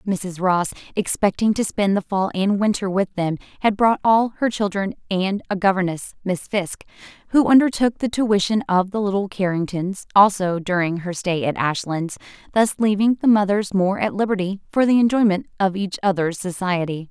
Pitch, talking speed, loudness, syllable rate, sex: 195 Hz, 170 wpm, -20 LUFS, 4.9 syllables/s, female